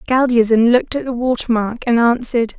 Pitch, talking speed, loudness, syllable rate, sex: 240 Hz, 185 wpm, -16 LUFS, 5.8 syllables/s, female